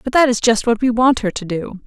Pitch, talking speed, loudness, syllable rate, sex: 230 Hz, 320 wpm, -16 LUFS, 5.7 syllables/s, female